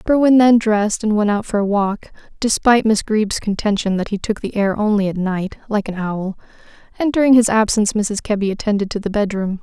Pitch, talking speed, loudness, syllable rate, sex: 210 Hz, 210 wpm, -17 LUFS, 5.7 syllables/s, female